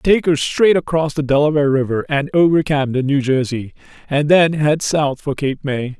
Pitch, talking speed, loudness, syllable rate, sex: 145 Hz, 190 wpm, -16 LUFS, 4.9 syllables/s, male